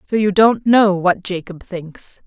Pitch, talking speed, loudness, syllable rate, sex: 195 Hz, 185 wpm, -15 LUFS, 3.8 syllables/s, female